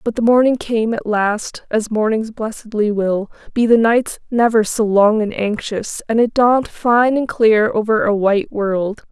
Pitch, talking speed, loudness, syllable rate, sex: 220 Hz, 185 wpm, -16 LUFS, 4.3 syllables/s, female